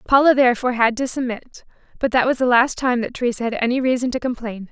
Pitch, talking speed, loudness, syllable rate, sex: 245 Hz, 230 wpm, -19 LUFS, 6.7 syllables/s, female